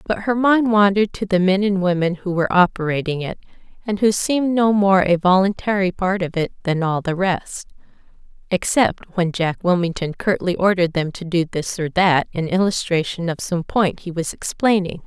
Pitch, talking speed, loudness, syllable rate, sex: 185 Hz, 185 wpm, -19 LUFS, 5.2 syllables/s, female